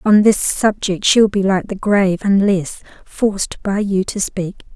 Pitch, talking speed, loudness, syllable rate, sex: 200 Hz, 190 wpm, -16 LUFS, 4.5 syllables/s, female